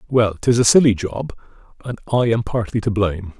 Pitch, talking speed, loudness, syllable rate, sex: 110 Hz, 210 wpm, -18 LUFS, 5.8 syllables/s, male